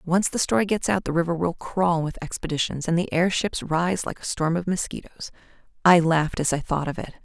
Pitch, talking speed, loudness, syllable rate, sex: 170 Hz, 225 wpm, -23 LUFS, 5.5 syllables/s, female